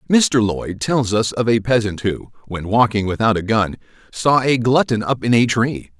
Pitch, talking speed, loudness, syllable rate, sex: 115 Hz, 200 wpm, -17 LUFS, 4.6 syllables/s, male